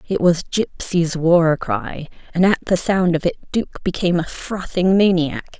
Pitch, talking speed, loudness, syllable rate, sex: 170 Hz, 170 wpm, -19 LUFS, 4.3 syllables/s, female